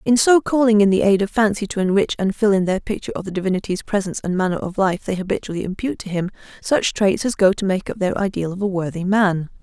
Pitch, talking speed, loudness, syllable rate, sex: 195 Hz, 255 wpm, -19 LUFS, 6.5 syllables/s, female